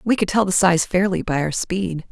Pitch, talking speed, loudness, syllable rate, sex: 185 Hz, 255 wpm, -19 LUFS, 5.0 syllables/s, female